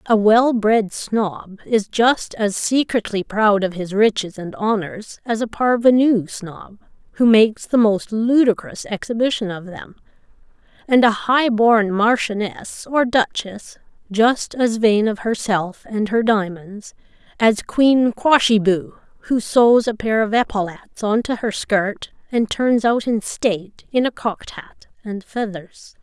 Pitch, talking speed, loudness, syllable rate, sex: 215 Hz, 150 wpm, -18 LUFS, 3.9 syllables/s, female